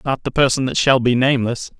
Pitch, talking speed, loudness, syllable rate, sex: 130 Hz, 235 wpm, -17 LUFS, 6.2 syllables/s, male